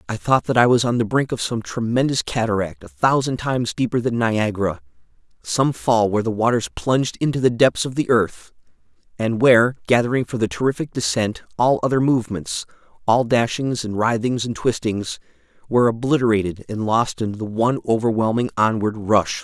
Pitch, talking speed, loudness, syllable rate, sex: 115 Hz, 165 wpm, -20 LUFS, 5.5 syllables/s, male